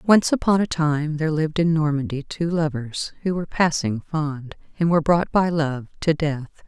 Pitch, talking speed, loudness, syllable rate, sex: 155 Hz, 190 wpm, -22 LUFS, 5.1 syllables/s, female